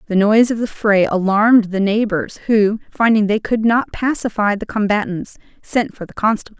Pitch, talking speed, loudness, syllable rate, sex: 210 Hz, 180 wpm, -16 LUFS, 5.2 syllables/s, female